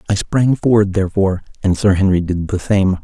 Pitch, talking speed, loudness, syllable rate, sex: 95 Hz, 200 wpm, -16 LUFS, 5.7 syllables/s, male